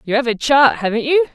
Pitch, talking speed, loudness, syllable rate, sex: 255 Hz, 265 wpm, -15 LUFS, 6.0 syllables/s, female